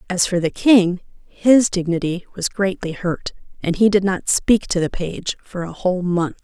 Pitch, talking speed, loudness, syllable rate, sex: 185 Hz, 195 wpm, -19 LUFS, 4.4 syllables/s, female